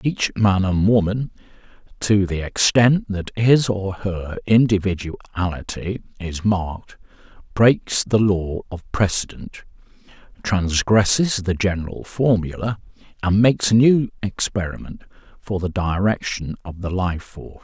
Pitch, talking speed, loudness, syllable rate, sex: 100 Hz, 120 wpm, -20 LUFS, 4.3 syllables/s, male